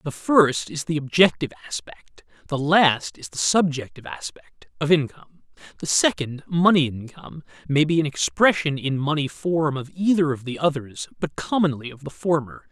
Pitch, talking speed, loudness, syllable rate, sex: 150 Hz, 165 wpm, -22 LUFS, 5.0 syllables/s, male